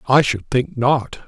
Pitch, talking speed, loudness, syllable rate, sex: 125 Hz, 190 wpm, -18 LUFS, 3.9 syllables/s, male